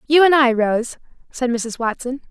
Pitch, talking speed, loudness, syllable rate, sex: 255 Hz, 180 wpm, -18 LUFS, 4.5 syllables/s, female